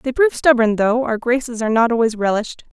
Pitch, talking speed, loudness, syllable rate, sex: 235 Hz, 215 wpm, -17 LUFS, 6.4 syllables/s, female